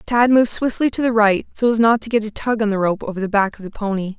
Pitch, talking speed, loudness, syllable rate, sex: 220 Hz, 315 wpm, -18 LUFS, 6.5 syllables/s, female